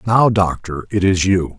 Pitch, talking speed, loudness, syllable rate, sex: 95 Hz, 190 wpm, -17 LUFS, 4.3 syllables/s, male